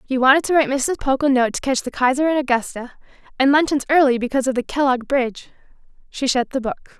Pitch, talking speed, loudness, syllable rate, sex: 265 Hz, 215 wpm, -19 LUFS, 6.5 syllables/s, female